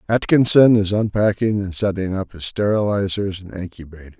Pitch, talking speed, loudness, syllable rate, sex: 100 Hz, 145 wpm, -18 LUFS, 5.3 syllables/s, male